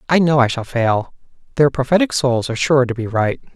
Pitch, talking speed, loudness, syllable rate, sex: 135 Hz, 220 wpm, -17 LUFS, 5.7 syllables/s, male